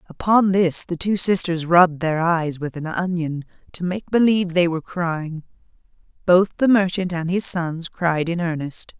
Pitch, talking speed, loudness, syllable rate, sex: 175 Hz, 175 wpm, -20 LUFS, 4.6 syllables/s, female